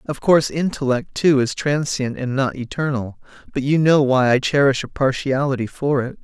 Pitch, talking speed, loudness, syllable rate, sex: 135 Hz, 185 wpm, -19 LUFS, 5.0 syllables/s, male